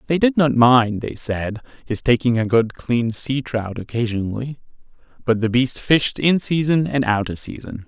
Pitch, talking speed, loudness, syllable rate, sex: 125 Hz, 185 wpm, -19 LUFS, 4.6 syllables/s, male